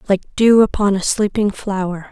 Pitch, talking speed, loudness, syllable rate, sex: 200 Hz, 170 wpm, -16 LUFS, 5.1 syllables/s, female